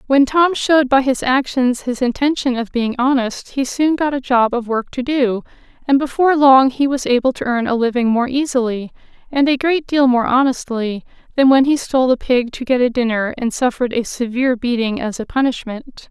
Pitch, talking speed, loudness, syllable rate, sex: 255 Hz, 210 wpm, -16 LUFS, 5.3 syllables/s, female